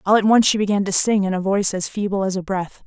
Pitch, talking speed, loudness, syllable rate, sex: 195 Hz, 315 wpm, -19 LUFS, 6.6 syllables/s, female